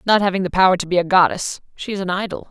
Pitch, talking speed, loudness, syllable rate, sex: 185 Hz, 285 wpm, -18 LUFS, 7.2 syllables/s, female